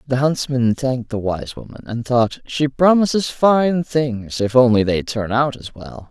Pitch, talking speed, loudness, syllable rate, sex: 130 Hz, 185 wpm, -18 LUFS, 4.2 syllables/s, male